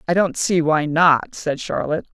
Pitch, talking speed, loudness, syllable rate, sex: 160 Hz, 190 wpm, -19 LUFS, 4.6 syllables/s, female